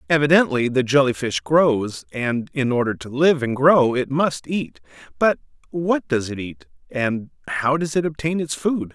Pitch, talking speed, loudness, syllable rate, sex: 135 Hz, 180 wpm, -20 LUFS, 4.4 syllables/s, male